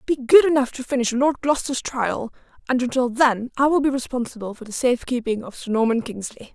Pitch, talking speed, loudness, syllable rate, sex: 250 Hz, 200 wpm, -21 LUFS, 5.9 syllables/s, female